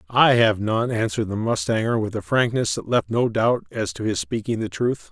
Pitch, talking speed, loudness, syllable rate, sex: 115 Hz, 225 wpm, -22 LUFS, 5.2 syllables/s, male